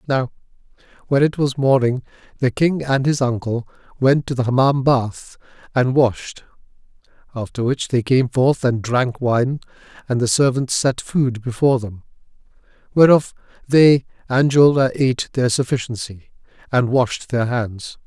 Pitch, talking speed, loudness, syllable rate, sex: 130 Hz, 145 wpm, -18 LUFS, 4.4 syllables/s, male